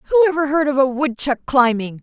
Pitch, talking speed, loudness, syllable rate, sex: 275 Hz, 205 wpm, -17 LUFS, 5.1 syllables/s, female